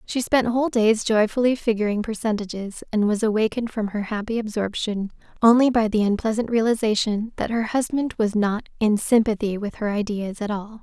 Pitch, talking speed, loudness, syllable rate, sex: 220 Hz, 170 wpm, -22 LUFS, 5.5 syllables/s, female